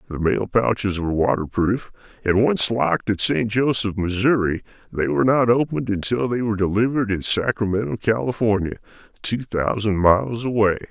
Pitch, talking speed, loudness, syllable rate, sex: 110 Hz, 150 wpm, -21 LUFS, 5.6 syllables/s, male